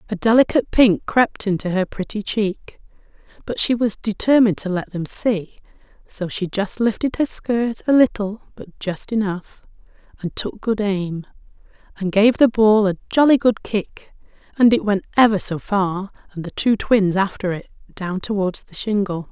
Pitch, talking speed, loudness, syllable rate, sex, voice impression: 205 Hz, 170 wpm, -19 LUFS, 4.7 syllables/s, female, feminine, adult-like, slightly soft, slightly muffled, calm, reassuring, slightly elegant